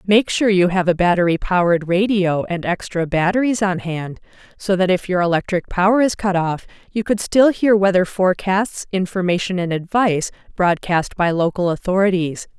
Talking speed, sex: 165 wpm, female